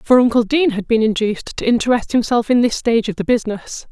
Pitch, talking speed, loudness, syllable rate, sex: 230 Hz, 230 wpm, -17 LUFS, 6.6 syllables/s, female